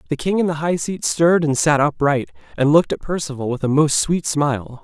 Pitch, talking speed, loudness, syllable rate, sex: 150 Hz, 235 wpm, -18 LUFS, 5.8 syllables/s, male